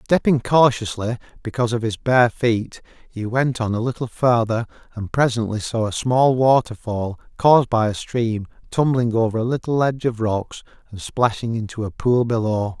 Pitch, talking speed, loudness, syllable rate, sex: 115 Hz, 170 wpm, -20 LUFS, 5.0 syllables/s, male